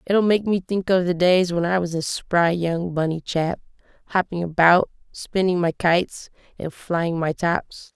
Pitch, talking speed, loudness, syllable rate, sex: 175 Hz, 190 wpm, -21 LUFS, 4.5 syllables/s, female